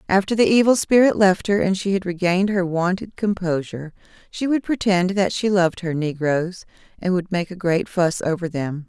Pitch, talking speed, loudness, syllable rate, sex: 185 Hz, 195 wpm, -20 LUFS, 5.3 syllables/s, female